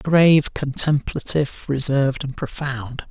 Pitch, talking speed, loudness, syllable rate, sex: 140 Hz, 95 wpm, -20 LUFS, 4.4 syllables/s, male